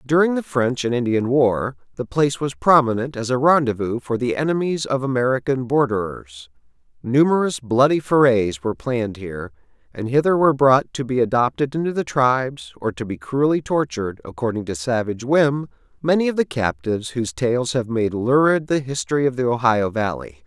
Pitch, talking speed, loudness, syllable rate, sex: 125 Hz, 175 wpm, -20 LUFS, 5.4 syllables/s, male